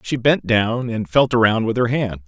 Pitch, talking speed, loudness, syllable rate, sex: 115 Hz, 235 wpm, -18 LUFS, 4.6 syllables/s, male